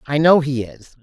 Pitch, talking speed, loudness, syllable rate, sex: 140 Hz, 235 wpm, -16 LUFS, 4.7 syllables/s, female